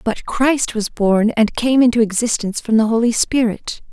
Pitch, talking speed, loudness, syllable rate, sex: 230 Hz, 185 wpm, -16 LUFS, 4.8 syllables/s, female